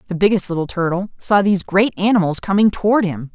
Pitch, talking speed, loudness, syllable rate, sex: 190 Hz, 200 wpm, -17 LUFS, 6.3 syllables/s, female